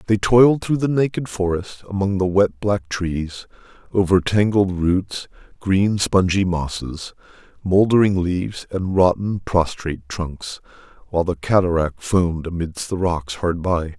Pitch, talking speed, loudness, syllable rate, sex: 95 Hz, 135 wpm, -20 LUFS, 4.3 syllables/s, male